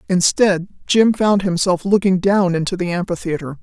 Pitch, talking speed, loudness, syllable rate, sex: 185 Hz, 150 wpm, -17 LUFS, 4.9 syllables/s, female